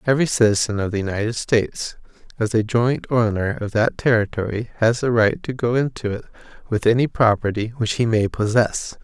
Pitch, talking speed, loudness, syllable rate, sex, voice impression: 115 Hz, 180 wpm, -20 LUFS, 5.5 syllables/s, male, masculine, adult-like, slightly tensed, slightly weak, clear, raspy, calm, friendly, reassuring, kind, modest